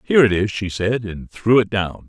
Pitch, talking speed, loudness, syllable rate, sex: 105 Hz, 260 wpm, -19 LUFS, 5.1 syllables/s, male